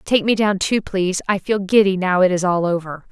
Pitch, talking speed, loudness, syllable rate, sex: 190 Hz, 250 wpm, -18 LUFS, 5.4 syllables/s, female